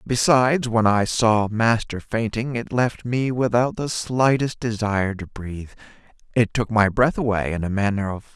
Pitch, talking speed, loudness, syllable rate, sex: 115 Hz, 170 wpm, -21 LUFS, 4.7 syllables/s, male